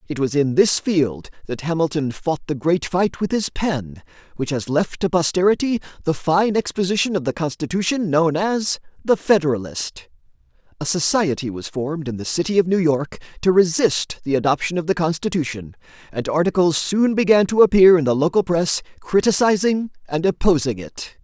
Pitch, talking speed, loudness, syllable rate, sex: 165 Hz, 170 wpm, -19 LUFS, 5.1 syllables/s, male